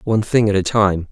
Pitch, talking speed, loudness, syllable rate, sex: 100 Hz, 270 wpm, -16 LUFS, 5.9 syllables/s, male